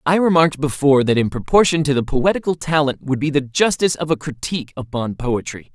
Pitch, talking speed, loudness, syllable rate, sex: 145 Hz, 200 wpm, -18 LUFS, 6.1 syllables/s, male